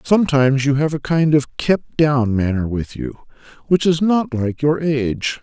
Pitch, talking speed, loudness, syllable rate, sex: 145 Hz, 190 wpm, -18 LUFS, 4.5 syllables/s, male